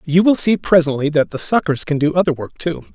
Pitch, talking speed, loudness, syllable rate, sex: 160 Hz, 245 wpm, -17 LUFS, 5.8 syllables/s, male